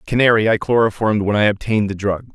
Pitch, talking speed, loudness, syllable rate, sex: 105 Hz, 230 wpm, -17 LUFS, 7.4 syllables/s, male